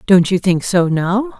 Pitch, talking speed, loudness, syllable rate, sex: 190 Hz, 215 wpm, -15 LUFS, 4.0 syllables/s, female